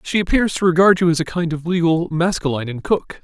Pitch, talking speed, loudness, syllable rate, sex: 170 Hz, 240 wpm, -18 LUFS, 6.4 syllables/s, male